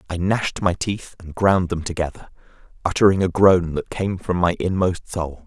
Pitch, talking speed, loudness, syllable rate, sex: 90 Hz, 185 wpm, -21 LUFS, 4.9 syllables/s, male